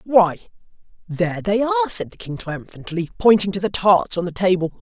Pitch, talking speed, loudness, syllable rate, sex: 190 Hz, 185 wpm, -20 LUFS, 5.4 syllables/s, male